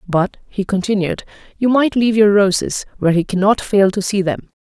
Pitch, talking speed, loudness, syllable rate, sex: 200 Hz, 195 wpm, -16 LUFS, 5.5 syllables/s, female